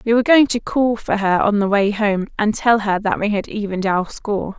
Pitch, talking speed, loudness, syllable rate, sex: 210 Hz, 260 wpm, -18 LUFS, 5.5 syllables/s, female